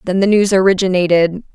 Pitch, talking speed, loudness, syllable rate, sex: 190 Hz, 155 wpm, -13 LUFS, 6.1 syllables/s, female